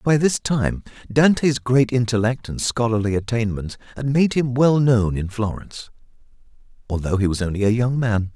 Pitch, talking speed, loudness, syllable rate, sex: 115 Hz, 165 wpm, -20 LUFS, 5.0 syllables/s, male